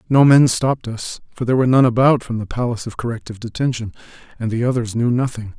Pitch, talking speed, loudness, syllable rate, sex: 120 Hz, 215 wpm, -18 LUFS, 7.3 syllables/s, male